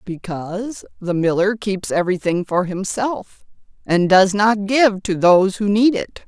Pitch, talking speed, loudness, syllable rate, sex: 195 Hz, 155 wpm, -18 LUFS, 4.3 syllables/s, female